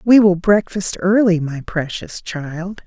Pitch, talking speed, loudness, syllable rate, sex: 185 Hz, 145 wpm, -17 LUFS, 3.8 syllables/s, female